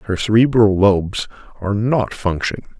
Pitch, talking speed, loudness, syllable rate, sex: 105 Hz, 130 wpm, -17 LUFS, 5.1 syllables/s, male